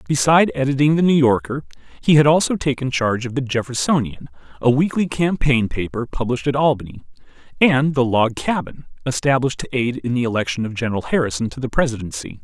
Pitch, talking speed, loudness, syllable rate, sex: 130 Hz, 175 wpm, -19 LUFS, 6.2 syllables/s, male